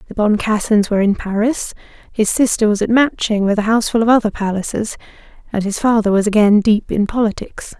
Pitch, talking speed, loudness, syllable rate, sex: 215 Hz, 185 wpm, -16 LUFS, 5.9 syllables/s, female